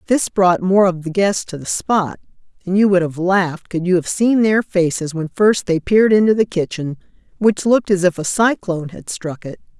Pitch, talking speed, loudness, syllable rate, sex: 185 Hz, 220 wpm, -17 LUFS, 5.2 syllables/s, female